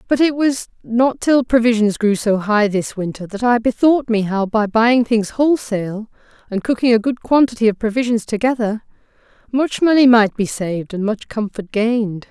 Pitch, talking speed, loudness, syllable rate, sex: 225 Hz, 180 wpm, -17 LUFS, 5.0 syllables/s, female